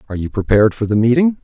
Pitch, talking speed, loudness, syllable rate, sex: 120 Hz, 250 wpm, -15 LUFS, 8.1 syllables/s, male